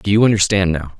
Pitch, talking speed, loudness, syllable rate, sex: 95 Hz, 240 wpm, -15 LUFS, 6.7 syllables/s, male